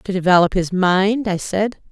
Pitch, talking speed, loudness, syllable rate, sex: 190 Hz, 190 wpm, -17 LUFS, 4.6 syllables/s, female